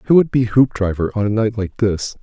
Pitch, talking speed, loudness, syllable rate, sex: 110 Hz, 245 wpm, -17 LUFS, 5.6 syllables/s, male